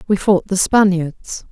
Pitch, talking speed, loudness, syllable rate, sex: 190 Hz, 160 wpm, -16 LUFS, 3.8 syllables/s, female